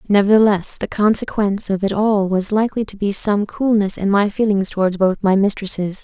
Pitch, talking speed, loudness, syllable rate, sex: 200 Hz, 190 wpm, -17 LUFS, 5.5 syllables/s, female